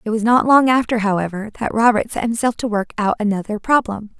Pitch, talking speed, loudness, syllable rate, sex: 220 Hz, 215 wpm, -17 LUFS, 5.9 syllables/s, female